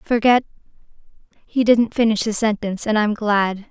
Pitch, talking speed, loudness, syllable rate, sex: 220 Hz, 145 wpm, -18 LUFS, 4.9 syllables/s, female